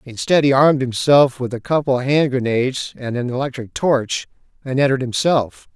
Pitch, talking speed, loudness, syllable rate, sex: 130 Hz, 175 wpm, -18 LUFS, 5.4 syllables/s, male